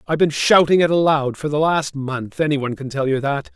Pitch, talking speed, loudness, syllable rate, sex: 145 Hz, 255 wpm, -18 LUFS, 5.9 syllables/s, male